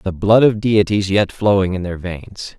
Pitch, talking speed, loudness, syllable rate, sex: 100 Hz, 210 wpm, -16 LUFS, 4.3 syllables/s, male